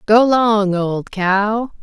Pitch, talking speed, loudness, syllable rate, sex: 210 Hz, 130 wpm, -16 LUFS, 2.5 syllables/s, female